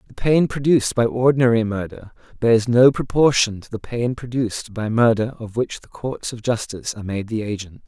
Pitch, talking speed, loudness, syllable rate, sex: 115 Hz, 190 wpm, -20 LUFS, 5.4 syllables/s, male